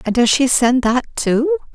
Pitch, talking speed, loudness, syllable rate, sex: 235 Hz, 205 wpm, -16 LUFS, 4.6 syllables/s, female